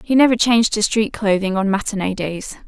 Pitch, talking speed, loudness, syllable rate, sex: 210 Hz, 200 wpm, -17 LUFS, 5.6 syllables/s, female